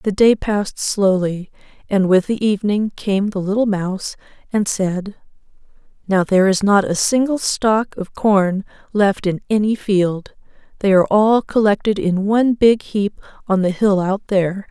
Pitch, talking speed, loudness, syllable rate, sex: 200 Hz, 165 wpm, -17 LUFS, 4.6 syllables/s, female